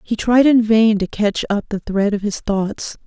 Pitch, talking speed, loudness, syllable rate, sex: 210 Hz, 235 wpm, -17 LUFS, 4.3 syllables/s, female